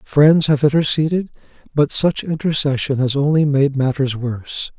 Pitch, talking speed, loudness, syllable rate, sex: 145 Hz, 140 wpm, -17 LUFS, 4.8 syllables/s, male